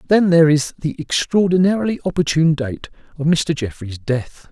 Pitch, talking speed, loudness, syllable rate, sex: 160 Hz, 145 wpm, -18 LUFS, 5.3 syllables/s, male